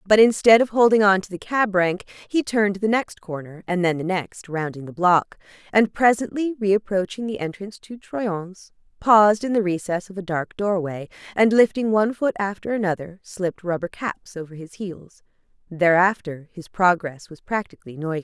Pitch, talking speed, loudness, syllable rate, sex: 195 Hz, 180 wpm, -21 LUFS, 5.1 syllables/s, female